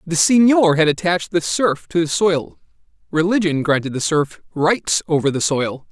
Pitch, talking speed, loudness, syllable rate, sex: 165 Hz, 175 wpm, -17 LUFS, 4.9 syllables/s, male